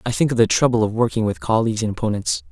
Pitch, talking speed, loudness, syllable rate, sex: 115 Hz, 265 wpm, -19 LUFS, 7.2 syllables/s, male